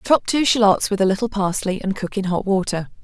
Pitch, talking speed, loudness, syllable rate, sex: 200 Hz, 235 wpm, -19 LUFS, 5.7 syllables/s, female